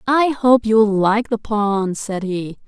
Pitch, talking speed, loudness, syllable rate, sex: 215 Hz, 180 wpm, -17 LUFS, 3.2 syllables/s, female